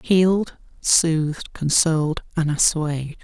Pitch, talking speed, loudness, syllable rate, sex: 160 Hz, 95 wpm, -20 LUFS, 4.0 syllables/s, male